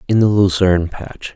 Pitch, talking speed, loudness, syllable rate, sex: 95 Hz, 175 wpm, -15 LUFS, 5.1 syllables/s, male